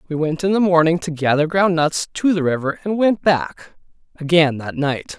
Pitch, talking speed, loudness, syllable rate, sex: 165 Hz, 210 wpm, -18 LUFS, 4.9 syllables/s, male